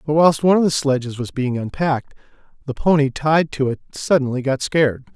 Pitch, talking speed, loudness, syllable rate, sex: 140 Hz, 200 wpm, -19 LUFS, 5.8 syllables/s, male